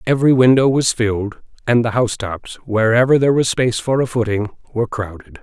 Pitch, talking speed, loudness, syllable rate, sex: 120 Hz, 190 wpm, -16 LUFS, 6.1 syllables/s, male